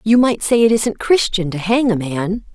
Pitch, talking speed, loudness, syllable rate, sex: 210 Hz, 235 wpm, -16 LUFS, 4.6 syllables/s, female